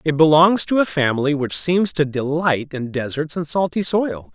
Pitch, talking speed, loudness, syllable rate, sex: 155 Hz, 195 wpm, -19 LUFS, 4.7 syllables/s, male